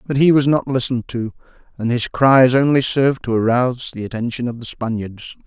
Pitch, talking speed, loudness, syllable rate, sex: 125 Hz, 200 wpm, -17 LUFS, 5.6 syllables/s, male